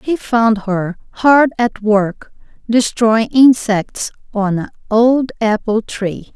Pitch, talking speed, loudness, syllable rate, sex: 225 Hz, 125 wpm, -15 LUFS, 3.1 syllables/s, female